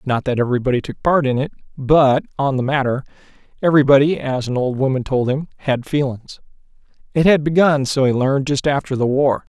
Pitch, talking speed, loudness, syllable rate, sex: 135 Hz, 190 wpm, -17 LUFS, 5.9 syllables/s, male